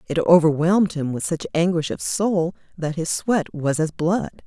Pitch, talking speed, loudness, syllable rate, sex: 170 Hz, 190 wpm, -21 LUFS, 4.5 syllables/s, female